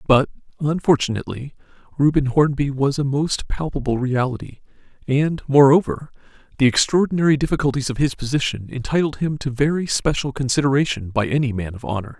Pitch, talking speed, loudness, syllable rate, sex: 135 Hz, 140 wpm, -20 LUFS, 5.8 syllables/s, male